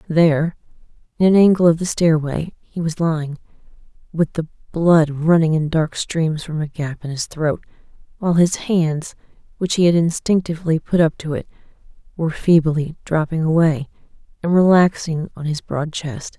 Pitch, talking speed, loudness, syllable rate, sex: 160 Hz, 160 wpm, -18 LUFS, 4.9 syllables/s, female